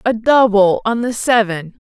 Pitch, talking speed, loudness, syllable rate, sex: 220 Hz, 160 wpm, -14 LUFS, 4.1 syllables/s, female